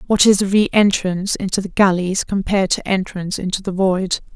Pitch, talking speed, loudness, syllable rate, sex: 190 Hz, 195 wpm, -17 LUFS, 5.7 syllables/s, female